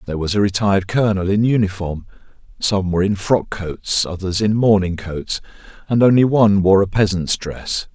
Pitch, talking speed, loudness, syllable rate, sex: 100 Hz, 175 wpm, -17 LUFS, 5.3 syllables/s, male